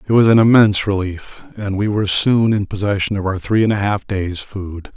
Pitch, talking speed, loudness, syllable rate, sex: 100 Hz, 230 wpm, -16 LUFS, 5.3 syllables/s, male